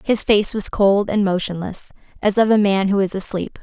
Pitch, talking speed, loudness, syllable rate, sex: 200 Hz, 215 wpm, -18 LUFS, 5.0 syllables/s, female